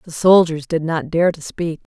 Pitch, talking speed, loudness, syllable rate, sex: 165 Hz, 215 wpm, -17 LUFS, 4.7 syllables/s, female